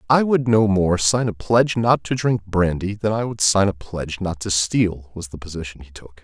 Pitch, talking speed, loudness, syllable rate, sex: 100 Hz, 240 wpm, -20 LUFS, 5.0 syllables/s, male